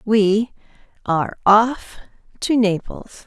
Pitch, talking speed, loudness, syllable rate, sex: 215 Hz, 90 wpm, -18 LUFS, 3.5 syllables/s, female